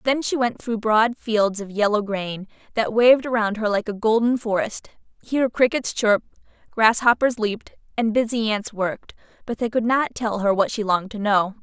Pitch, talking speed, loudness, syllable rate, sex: 220 Hz, 190 wpm, -21 LUFS, 5.2 syllables/s, female